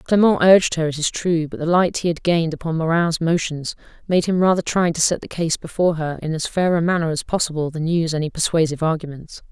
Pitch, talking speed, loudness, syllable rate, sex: 165 Hz, 235 wpm, -19 LUFS, 6.2 syllables/s, female